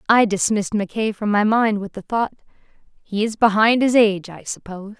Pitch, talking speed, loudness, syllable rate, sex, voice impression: 210 Hz, 190 wpm, -19 LUFS, 5.5 syllables/s, female, feminine, adult-like, tensed, powerful, clear, raspy, slightly intellectual, slightly unique, elegant, lively, slightly intense, sharp